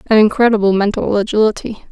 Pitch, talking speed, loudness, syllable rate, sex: 210 Hz, 125 wpm, -14 LUFS, 6.3 syllables/s, female